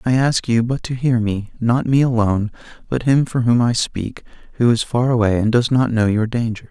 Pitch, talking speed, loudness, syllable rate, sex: 120 Hz, 235 wpm, -18 LUFS, 5.2 syllables/s, male